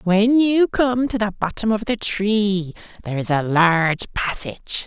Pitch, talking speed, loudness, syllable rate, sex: 205 Hz, 175 wpm, -19 LUFS, 4.4 syllables/s, male